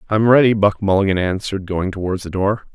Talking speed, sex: 195 wpm, male